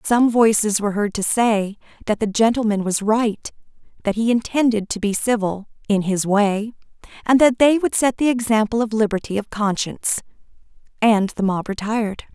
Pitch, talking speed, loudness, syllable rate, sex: 220 Hz, 165 wpm, -19 LUFS, 5.1 syllables/s, female